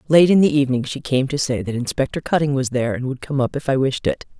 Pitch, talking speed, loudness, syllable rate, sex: 135 Hz, 285 wpm, -19 LUFS, 6.6 syllables/s, female